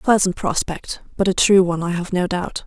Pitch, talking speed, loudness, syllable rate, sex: 185 Hz, 250 wpm, -19 LUFS, 5.6 syllables/s, female